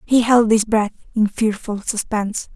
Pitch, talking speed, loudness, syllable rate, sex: 220 Hz, 165 wpm, -18 LUFS, 4.6 syllables/s, female